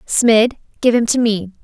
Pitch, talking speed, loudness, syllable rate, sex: 225 Hz, 185 wpm, -15 LUFS, 3.9 syllables/s, female